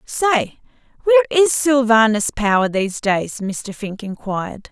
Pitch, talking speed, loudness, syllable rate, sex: 230 Hz, 125 wpm, -18 LUFS, 4.3 syllables/s, female